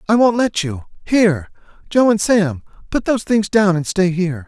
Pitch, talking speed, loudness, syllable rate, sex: 190 Hz, 175 wpm, -17 LUFS, 5.3 syllables/s, male